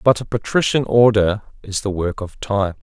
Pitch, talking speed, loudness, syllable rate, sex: 105 Hz, 190 wpm, -18 LUFS, 4.8 syllables/s, male